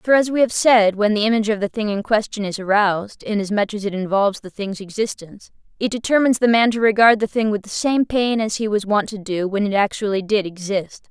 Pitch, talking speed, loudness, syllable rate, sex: 210 Hz, 245 wpm, -19 LUFS, 6.0 syllables/s, female